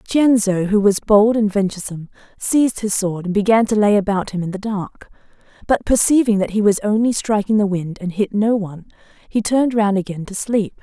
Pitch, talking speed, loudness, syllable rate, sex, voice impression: 205 Hz, 205 wpm, -17 LUFS, 5.6 syllables/s, female, gender-neutral, slightly dark, soft, calm, reassuring, sweet, slightly kind